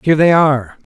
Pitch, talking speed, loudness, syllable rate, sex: 145 Hz, 190 wpm, -13 LUFS, 7.0 syllables/s, male